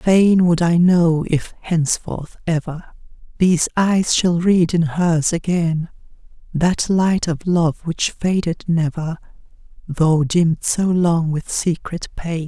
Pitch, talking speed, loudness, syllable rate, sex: 170 Hz, 135 wpm, -18 LUFS, 3.7 syllables/s, female